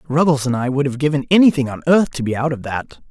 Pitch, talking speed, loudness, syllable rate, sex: 140 Hz, 270 wpm, -17 LUFS, 6.3 syllables/s, male